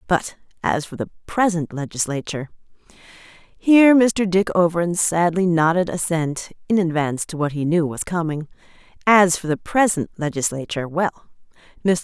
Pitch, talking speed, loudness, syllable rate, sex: 170 Hz, 120 wpm, -20 LUFS, 5.1 syllables/s, female